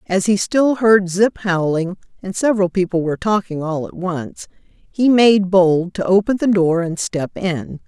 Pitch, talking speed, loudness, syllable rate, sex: 190 Hz, 185 wpm, -17 LUFS, 4.3 syllables/s, female